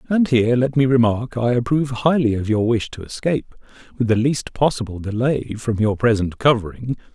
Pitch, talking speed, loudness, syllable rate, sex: 120 Hz, 185 wpm, -19 LUFS, 5.6 syllables/s, male